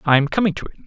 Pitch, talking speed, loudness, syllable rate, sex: 170 Hz, 275 wpm, -19 LUFS, 7.7 syllables/s, male